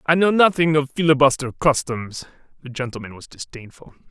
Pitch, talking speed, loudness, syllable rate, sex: 140 Hz, 145 wpm, -19 LUFS, 5.6 syllables/s, male